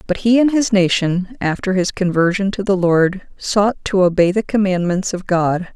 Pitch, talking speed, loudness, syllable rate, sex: 190 Hz, 190 wpm, -16 LUFS, 4.7 syllables/s, female